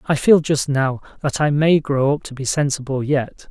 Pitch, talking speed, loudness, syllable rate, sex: 140 Hz, 225 wpm, -18 LUFS, 4.7 syllables/s, male